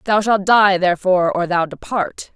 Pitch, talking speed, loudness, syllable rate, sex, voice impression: 190 Hz, 180 wpm, -16 LUFS, 5.0 syllables/s, female, very feminine, slightly adult-like, slightly clear, fluent, refreshing, friendly, slightly lively